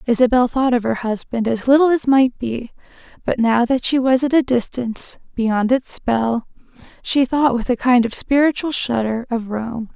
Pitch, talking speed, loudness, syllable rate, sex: 245 Hz, 185 wpm, -18 LUFS, 4.7 syllables/s, female